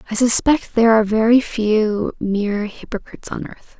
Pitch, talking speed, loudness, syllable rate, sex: 220 Hz, 160 wpm, -17 LUFS, 5.1 syllables/s, female